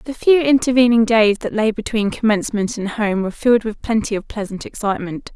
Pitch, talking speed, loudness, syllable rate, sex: 220 Hz, 190 wpm, -18 LUFS, 6.0 syllables/s, female